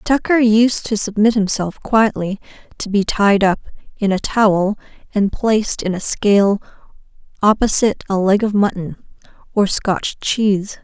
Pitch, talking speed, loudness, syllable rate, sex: 205 Hz, 145 wpm, -16 LUFS, 4.6 syllables/s, female